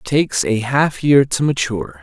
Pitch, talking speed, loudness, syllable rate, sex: 130 Hz, 180 wpm, -16 LUFS, 4.6 syllables/s, male